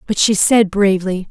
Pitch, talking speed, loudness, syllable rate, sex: 200 Hz, 185 wpm, -14 LUFS, 5.1 syllables/s, female